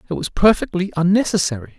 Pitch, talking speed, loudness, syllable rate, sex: 170 Hz, 135 wpm, -18 LUFS, 6.7 syllables/s, male